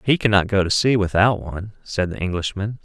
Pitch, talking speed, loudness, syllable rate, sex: 100 Hz, 210 wpm, -20 LUFS, 5.7 syllables/s, male